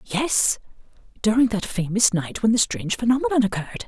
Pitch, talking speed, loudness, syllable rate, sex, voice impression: 220 Hz, 155 wpm, -21 LUFS, 6.1 syllables/s, female, feminine, middle-aged, tensed, powerful, fluent, raspy, slightly friendly, unique, elegant, slightly wild, lively, intense